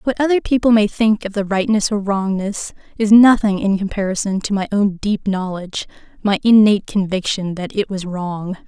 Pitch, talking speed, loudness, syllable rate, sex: 200 Hz, 180 wpm, -17 LUFS, 5.1 syllables/s, female